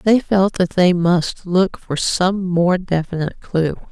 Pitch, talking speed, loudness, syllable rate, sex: 180 Hz, 170 wpm, -18 LUFS, 3.8 syllables/s, female